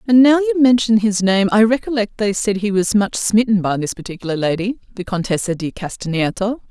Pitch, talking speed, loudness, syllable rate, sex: 205 Hz, 195 wpm, -17 LUFS, 5.6 syllables/s, female